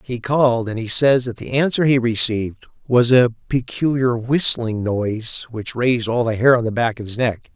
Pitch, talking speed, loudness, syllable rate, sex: 120 Hz, 205 wpm, -18 LUFS, 5.0 syllables/s, male